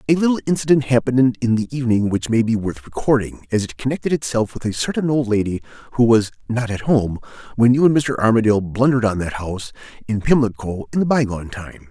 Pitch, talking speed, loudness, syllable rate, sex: 120 Hz, 205 wpm, -19 LUFS, 6.3 syllables/s, male